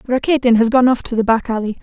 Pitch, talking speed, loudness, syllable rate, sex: 240 Hz, 265 wpm, -15 LUFS, 6.7 syllables/s, female